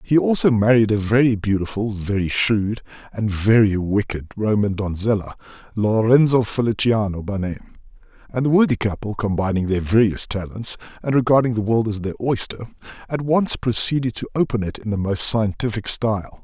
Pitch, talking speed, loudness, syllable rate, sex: 110 Hz, 155 wpm, -20 LUFS, 5.3 syllables/s, male